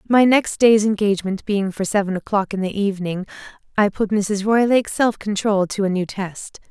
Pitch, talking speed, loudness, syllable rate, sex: 205 Hz, 190 wpm, -19 LUFS, 5.2 syllables/s, female